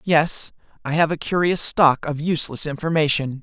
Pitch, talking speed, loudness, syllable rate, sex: 155 Hz, 160 wpm, -20 LUFS, 5.1 syllables/s, male